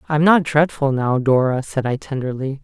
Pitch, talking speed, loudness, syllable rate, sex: 140 Hz, 205 wpm, -18 LUFS, 5.3 syllables/s, male